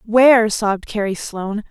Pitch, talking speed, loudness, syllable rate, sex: 215 Hz, 140 wpm, -17 LUFS, 5.2 syllables/s, female